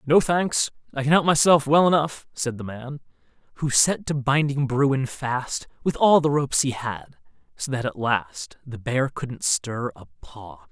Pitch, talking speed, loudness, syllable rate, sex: 130 Hz, 185 wpm, -22 LUFS, 4.2 syllables/s, male